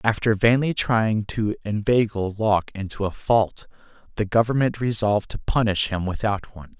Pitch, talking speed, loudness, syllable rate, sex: 105 Hz, 150 wpm, -22 LUFS, 5.0 syllables/s, male